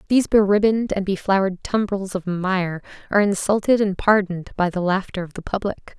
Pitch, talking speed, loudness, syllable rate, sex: 195 Hz, 190 wpm, -21 LUFS, 5.9 syllables/s, female